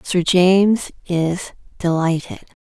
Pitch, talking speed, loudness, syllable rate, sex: 180 Hz, 90 wpm, -18 LUFS, 4.0 syllables/s, female